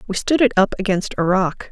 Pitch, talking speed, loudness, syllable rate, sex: 200 Hz, 245 wpm, -18 LUFS, 5.6 syllables/s, female